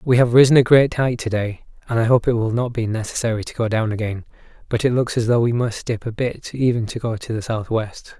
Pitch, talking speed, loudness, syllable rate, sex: 115 Hz, 265 wpm, -19 LUFS, 5.7 syllables/s, male